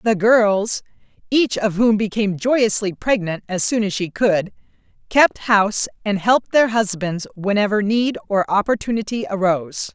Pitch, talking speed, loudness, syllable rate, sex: 205 Hz, 135 wpm, -19 LUFS, 4.6 syllables/s, female